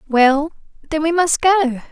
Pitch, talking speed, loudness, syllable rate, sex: 300 Hz, 155 wpm, -16 LUFS, 3.9 syllables/s, female